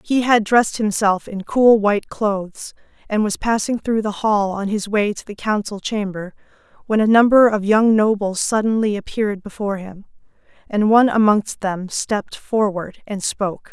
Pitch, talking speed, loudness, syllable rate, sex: 210 Hz, 170 wpm, -18 LUFS, 4.9 syllables/s, female